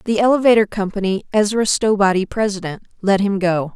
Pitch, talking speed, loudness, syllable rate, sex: 200 Hz, 145 wpm, -17 LUFS, 5.6 syllables/s, female